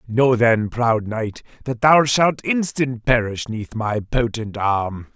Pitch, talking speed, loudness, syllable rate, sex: 120 Hz, 150 wpm, -19 LUFS, 3.4 syllables/s, male